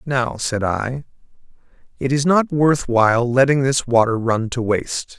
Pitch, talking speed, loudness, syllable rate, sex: 125 Hz, 160 wpm, -18 LUFS, 4.3 syllables/s, male